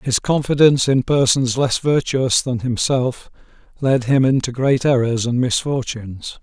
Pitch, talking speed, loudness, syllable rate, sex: 130 Hz, 140 wpm, -17 LUFS, 4.5 syllables/s, male